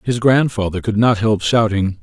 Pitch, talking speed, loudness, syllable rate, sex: 110 Hz, 180 wpm, -16 LUFS, 4.7 syllables/s, male